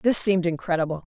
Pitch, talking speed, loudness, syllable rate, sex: 175 Hz, 165 wpm, -21 LUFS, 7.3 syllables/s, female